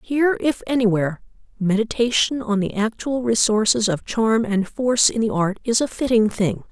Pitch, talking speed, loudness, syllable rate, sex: 225 Hz, 170 wpm, -20 LUFS, 5.1 syllables/s, female